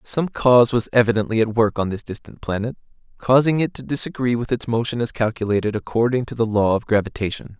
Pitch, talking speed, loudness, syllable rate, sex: 115 Hz, 195 wpm, -20 LUFS, 6.1 syllables/s, male